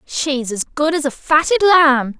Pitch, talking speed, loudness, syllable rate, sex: 290 Hz, 220 wpm, -15 LUFS, 4.4 syllables/s, female